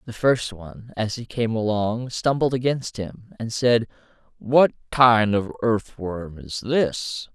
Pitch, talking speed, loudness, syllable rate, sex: 115 Hz, 145 wpm, -22 LUFS, 3.7 syllables/s, male